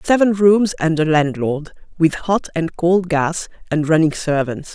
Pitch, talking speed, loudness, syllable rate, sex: 165 Hz, 165 wpm, -17 LUFS, 4.1 syllables/s, female